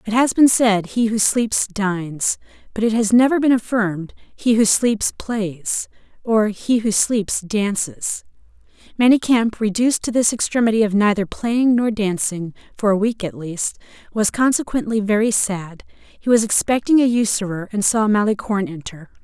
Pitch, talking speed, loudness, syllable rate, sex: 215 Hz, 150 wpm, -18 LUFS, 4.6 syllables/s, female